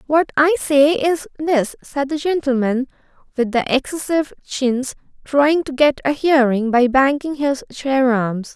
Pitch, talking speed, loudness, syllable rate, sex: 275 Hz, 155 wpm, -18 LUFS, 4.1 syllables/s, female